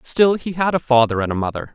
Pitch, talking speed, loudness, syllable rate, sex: 140 Hz, 275 wpm, -18 LUFS, 6.1 syllables/s, male